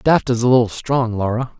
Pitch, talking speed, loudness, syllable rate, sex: 120 Hz, 225 wpm, -17 LUFS, 5.4 syllables/s, male